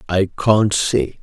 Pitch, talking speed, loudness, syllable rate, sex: 95 Hz, 145 wpm, -17 LUFS, 3.2 syllables/s, male